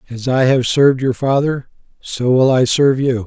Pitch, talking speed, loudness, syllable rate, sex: 130 Hz, 200 wpm, -15 LUFS, 5.1 syllables/s, male